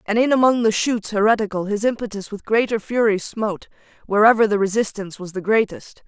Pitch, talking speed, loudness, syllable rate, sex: 215 Hz, 180 wpm, -19 LUFS, 6.0 syllables/s, female